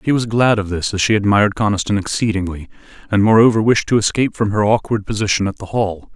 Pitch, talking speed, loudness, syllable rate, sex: 105 Hz, 215 wpm, -16 LUFS, 6.4 syllables/s, male